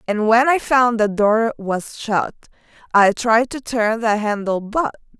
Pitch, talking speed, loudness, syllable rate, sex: 225 Hz, 175 wpm, -18 LUFS, 3.9 syllables/s, female